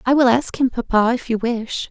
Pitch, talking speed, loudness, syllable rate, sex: 240 Hz, 250 wpm, -18 LUFS, 5.1 syllables/s, female